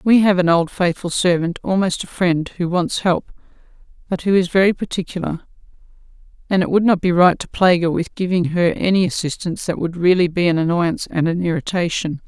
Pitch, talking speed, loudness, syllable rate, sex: 175 Hz, 195 wpm, -18 LUFS, 5.8 syllables/s, female